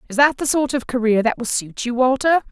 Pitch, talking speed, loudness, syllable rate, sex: 250 Hz, 265 wpm, -19 LUFS, 5.8 syllables/s, female